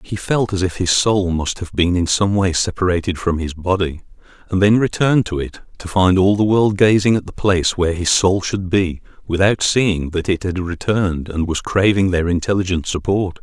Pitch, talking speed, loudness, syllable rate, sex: 95 Hz, 210 wpm, -17 LUFS, 5.2 syllables/s, male